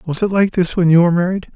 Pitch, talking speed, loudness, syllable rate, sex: 180 Hz, 310 wpm, -15 LUFS, 7.0 syllables/s, male